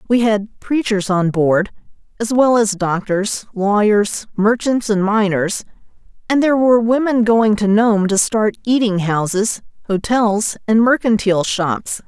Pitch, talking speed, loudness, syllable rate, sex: 215 Hz, 140 wpm, -16 LUFS, 4.2 syllables/s, female